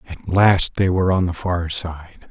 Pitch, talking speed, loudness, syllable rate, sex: 90 Hz, 210 wpm, -19 LUFS, 4.3 syllables/s, male